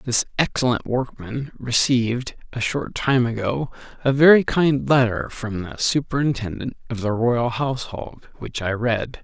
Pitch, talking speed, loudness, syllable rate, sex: 125 Hz, 145 wpm, -21 LUFS, 4.3 syllables/s, male